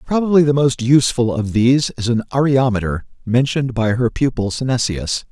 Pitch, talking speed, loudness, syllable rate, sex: 125 Hz, 160 wpm, -17 LUFS, 5.6 syllables/s, male